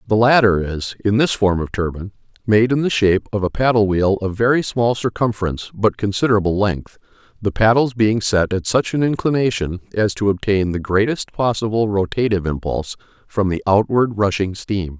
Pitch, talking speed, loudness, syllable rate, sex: 105 Hz, 175 wpm, -18 LUFS, 5.4 syllables/s, male